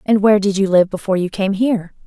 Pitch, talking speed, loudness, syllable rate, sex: 200 Hz, 260 wpm, -16 LUFS, 7.0 syllables/s, female